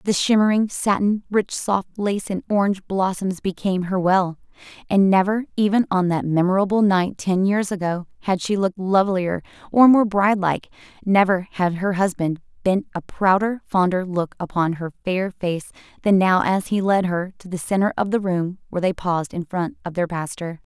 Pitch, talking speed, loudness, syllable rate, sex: 190 Hz, 180 wpm, -21 LUFS, 5.2 syllables/s, female